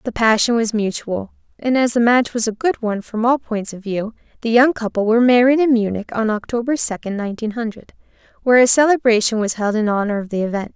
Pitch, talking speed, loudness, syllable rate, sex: 225 Hz, 220 wpm, -17 LUFS, 6.0 syllables/s, female